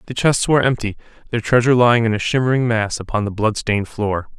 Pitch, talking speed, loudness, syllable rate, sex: 115 Hz, 205 wpm, -18 LUFS, 6.7 syllables/s, male